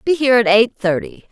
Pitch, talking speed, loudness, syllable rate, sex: 235 Hz, 230 wpm, -15 LUFS, 5.8 syllables/s, female